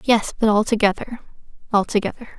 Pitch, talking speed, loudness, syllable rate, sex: 215 Hz, 100 wpm, -20 LUFS, 5.8 syllables/s, female